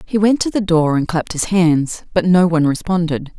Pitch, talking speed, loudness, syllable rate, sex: 175 Hz, 230 wpm, -16 LUFS, 5.4 syllables/s, female